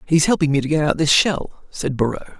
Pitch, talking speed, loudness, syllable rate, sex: 150 Hz, 250 wpm, -18 LUFS, 5.9 syllables/s, male